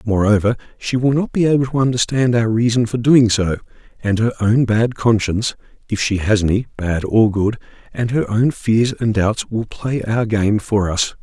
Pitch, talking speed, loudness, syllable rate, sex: 110 Hz, 185 wpm, -17 LUFS, 4.8 syllables/s, male